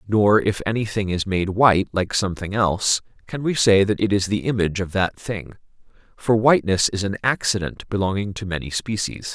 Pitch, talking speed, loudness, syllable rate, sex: 100 Hz, 185 wpm, -21 LUFS, 5.4 syllables/s, male